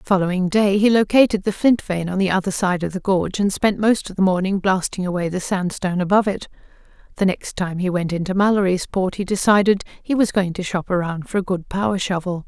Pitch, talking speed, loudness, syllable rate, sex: 190 Hz, 225 wpm, -20 LUFS, 5.9 syllables/s, female